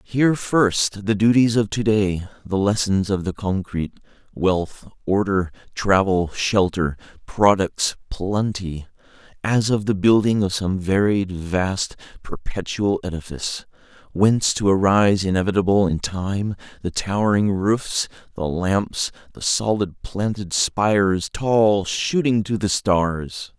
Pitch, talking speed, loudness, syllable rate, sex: 100 Hz, 120 wpm, -21 LUFS, 3.9 syllables/s, male